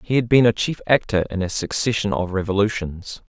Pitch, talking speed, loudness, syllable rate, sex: 105 Hz, 195 wpm, -20 LUFS, 5.5 syllables/s, male